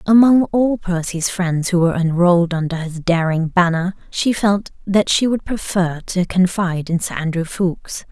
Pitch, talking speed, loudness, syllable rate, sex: 180 Hz, 170 wpm, -18 LUFS, 4.7 syllables/s, female